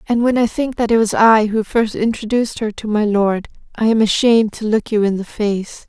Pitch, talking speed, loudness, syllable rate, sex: 220 Hz, 245 wpm, -16 LUFS, 5.3 syllables/s, female